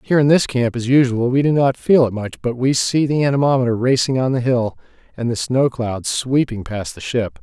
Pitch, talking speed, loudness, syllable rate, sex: 125 Hz, 235 wpm, -18 LUFS, 5.4 syllables/s, male